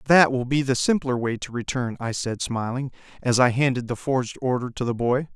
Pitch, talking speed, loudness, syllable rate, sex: 125 Hz, 225 wpm, -24 LUFS, 5.5 syllables/s, male